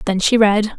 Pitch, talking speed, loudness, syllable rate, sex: 210 Hz, 230 wpm, -15 LUFS, 4.6 syllables/s, female